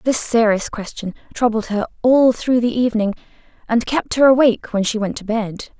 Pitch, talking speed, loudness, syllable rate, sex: 230 Hz, 185 wpm, -18 LUFS, 5.2 syllables/s, female